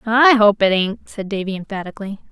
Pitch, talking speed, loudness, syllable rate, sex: 210 Hz, 180 wpm, -17 LUFS, 5.7 syllables/s, female